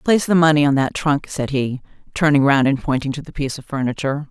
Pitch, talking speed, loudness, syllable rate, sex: 140 Hz, 235 wpm, -18 LUFS, 6.4 syllables/s, female